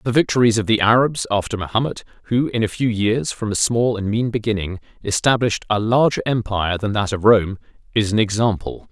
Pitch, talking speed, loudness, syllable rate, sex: 110 Hz, 195 wpm, -19 LUFS, 5.7 syllables/s, male